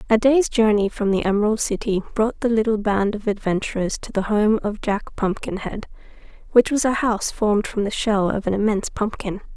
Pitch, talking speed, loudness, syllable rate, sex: 210 Hz, 195 wpm, -21 LUFS, 5.5 syllables/s, female